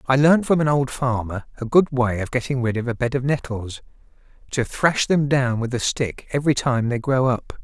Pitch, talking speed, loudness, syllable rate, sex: 130 Hz, 220 wpm, -21 LUFS, 5.1 syllables/s, male